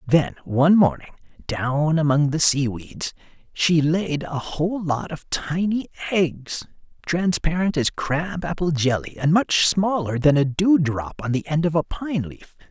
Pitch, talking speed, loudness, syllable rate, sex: 155 Hz, 165 wpm, -22 LUFS, 4.1 syllables/s, male